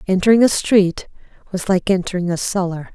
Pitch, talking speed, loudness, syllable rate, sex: 190 Hz, 165 wpm, -17 LUFS, 5.5 syllables/s, female